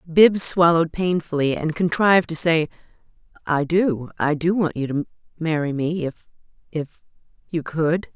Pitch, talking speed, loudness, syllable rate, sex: 165 Hz, 120 wpm, -21 LUFS, 4.9 syllables/s, female